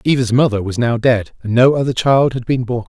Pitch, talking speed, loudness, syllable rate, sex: 120 Hz, 245 wpm, -15 LUFS, 5.6 syllables/s, male